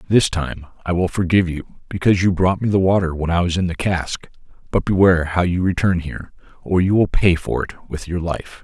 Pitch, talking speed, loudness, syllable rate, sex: 90 Hz, 230 wpm, -19 LUFS, 5.6 syllables/s, male